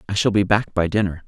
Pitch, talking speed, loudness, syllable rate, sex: 100 Hz, 280 wpm, -20 LUFS, 6.4 syllables/s, male